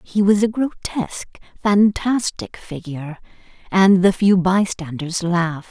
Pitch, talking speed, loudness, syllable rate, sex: 190 Hz, 115 wpm, -18 LUFS, 4.2 syllables/s, female